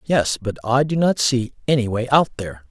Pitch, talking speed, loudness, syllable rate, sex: 125 Hz, 220 wpm, -19 LUFS, 5.5 syllables/s, male